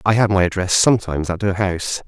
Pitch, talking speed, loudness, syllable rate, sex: 95 Hz, 230 wpm, -18 LUFS, 6.7 syllables/s, male